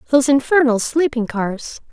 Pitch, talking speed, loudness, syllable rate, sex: 260 Hz, 125 wpm, -17 LUFS, 5.0 syllables/s, female